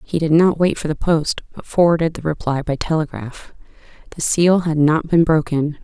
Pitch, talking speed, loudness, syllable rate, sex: 160 Hz, 185 wpm, -18 LUFS, 5.2 syllables/s, female